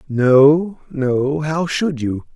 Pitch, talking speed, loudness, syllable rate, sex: 145 Hz, 125 wpm, -16 LUFS, 2.5 syllables/s, male